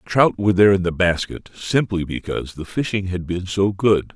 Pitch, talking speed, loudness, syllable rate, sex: 95 Hz, 215 wpm, -20 LUFS, 5.5 syllables/s, male